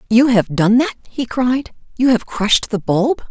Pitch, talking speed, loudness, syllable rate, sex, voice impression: 240 Hz, 200 wpm, -16 LUFS, 4.6 syllables/s, female, feminine, adult-like, relaxed, slightly bright, soft, raspy, intellectual, calm, friendly, reassuring, elegant, kind, modest